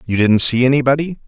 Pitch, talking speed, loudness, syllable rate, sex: 130 Hz, 190 wpm, -14 LUFS, 6.3 syllables/s, male